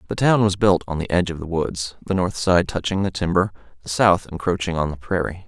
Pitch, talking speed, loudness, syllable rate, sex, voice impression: 90 Hz, 240 wpm, -21 LUFS, 5.9 syllables/s, male, very masculine, middle-aged, very thick, tensed, slightly powerful, dark, slightly soft, muffled, fluent, slightly raspy, cool, intellectual, slightly refreshing, sincere, calm, friendly, reassuring, very unique, slightly elegant, wild, sweet, slightly lively, kind, modest